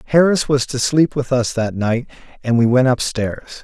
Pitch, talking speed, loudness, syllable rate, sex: 130 Hz, 200 wpm, -17 LUFS, 4.9 syllables/s, male